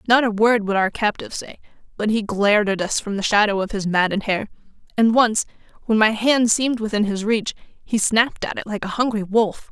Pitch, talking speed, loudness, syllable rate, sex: 215 Hz, 220 wpm, -20 LUFS, 5.5 syllables/s, female